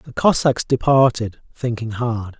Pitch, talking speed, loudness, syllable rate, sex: 120 Hz, 125 wpm, -19 LUFS, 4.0 syllables/s, male